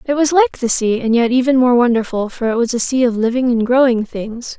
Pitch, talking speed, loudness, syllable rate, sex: 240 Hz, 260 wpm, -15 LUFS, 5.6 syllables/s, female